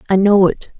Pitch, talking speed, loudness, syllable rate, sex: 195 Hz, 225 wpm, -13 LUFS, 5.6 syllables/s, female